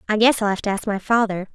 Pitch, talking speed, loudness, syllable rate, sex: 210 Hz, 310 wpm, -20 LUFS, 6.7 syllables/s, female